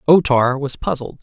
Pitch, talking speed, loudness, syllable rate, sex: 140 Hz, 195 wpm, -17 LUFS, 4.7 syllables/s, male